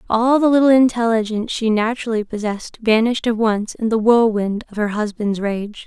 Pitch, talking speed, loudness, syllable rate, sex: 225 Hz, 175 wpm, -18 LUFS, 5.5 syllables/s, female